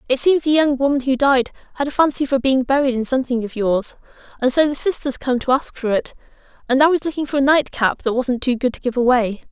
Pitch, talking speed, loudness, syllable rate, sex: 265 Hz, 250 wpm, -18 LUFS, 6.1 syllables/s, female